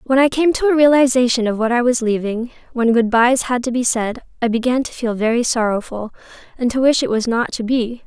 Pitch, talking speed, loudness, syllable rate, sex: 240 Hz, 240 wpm, -17 LUFS, 5.6 syllables/s, female